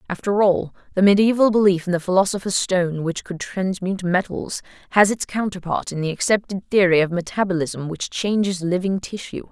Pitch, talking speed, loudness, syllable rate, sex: 185 Hz, 165 wpm, -20 LUFS, 5.5 syllables/s, female